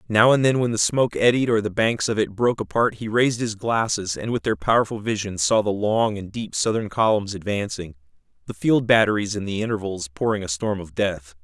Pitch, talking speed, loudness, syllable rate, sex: 105 Hz, 220 wpm, -22 LUFS, 5.6 syllables/s, male